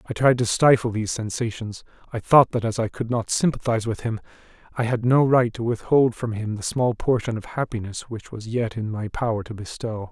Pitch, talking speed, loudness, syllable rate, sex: 115 Hz, 220 wpm, -23 LUFS, 5.5 syllables/s, male